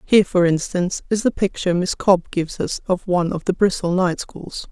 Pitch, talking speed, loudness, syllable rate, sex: 180 Hz, 215 wpm, -20 LUFS, 5.9 syllables/s, female